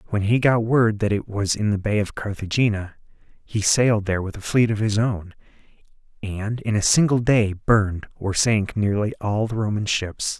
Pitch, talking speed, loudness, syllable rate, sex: 105 Hz, 195 wpm, -21 LUFS, 5.0 syllables/s, male